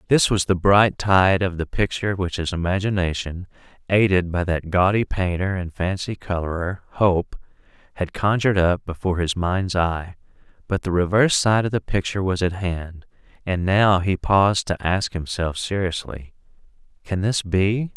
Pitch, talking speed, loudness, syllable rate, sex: 95 Hz, 160 wpm, -21 LUFS, 4.9 syllables/s, male